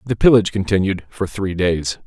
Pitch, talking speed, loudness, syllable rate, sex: 95 Hz, 175 wpm, -18 LUFS, 5.6 syllables/s, male